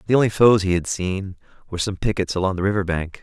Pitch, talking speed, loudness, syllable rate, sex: 95 Hz, 240 wpm, -20 LUFS, 6.6 syllables/s, male